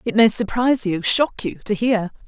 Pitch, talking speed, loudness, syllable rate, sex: 215 Hz, 210 wpm, -19 LUFS, 5.0 syllables/s, female